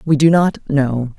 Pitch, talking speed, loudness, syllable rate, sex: 145 Hz, 200 wpm, -15 LUFS, 4.0 syllables/s, female